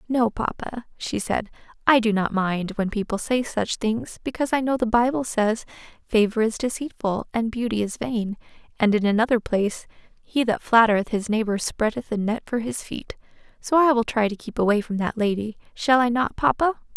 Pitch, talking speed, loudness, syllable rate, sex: 225 Hz, 195 wpm, -23 LUFS, 5.2 syllables/s, female